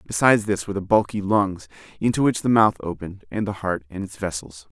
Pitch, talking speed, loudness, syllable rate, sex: 100 Hz, 215 wpm, -22 LUFS, 6.0 syllables/s, male